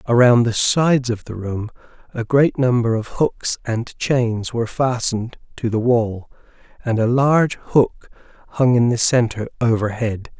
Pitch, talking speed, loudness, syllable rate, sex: 120 Hz, 155 wpm, -18 LUFS, 4.4 syllables/s, male